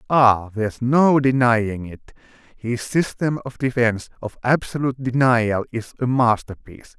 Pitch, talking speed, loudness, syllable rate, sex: 120 Hz, 110 wpm, -20 LUFS, 4.6 syllables/s, male